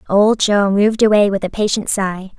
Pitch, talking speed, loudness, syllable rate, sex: 200 Hz, 200 wpm, -15 LUFS, 5.1 syllables/s, female